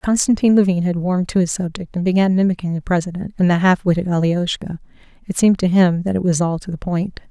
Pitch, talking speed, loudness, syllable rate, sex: 180 Hz, 230 wpm, -18 LUFS, 6.3 syllables/s, female